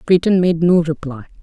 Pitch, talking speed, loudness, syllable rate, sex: 170 Hz, 170 wpm, -15 LUFS, 5.4 syllables/s, female